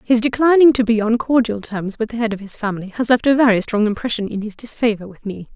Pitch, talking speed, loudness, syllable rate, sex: 225 Hz, 260 wpm, -17 LUFS, 6.3 syllables/s, female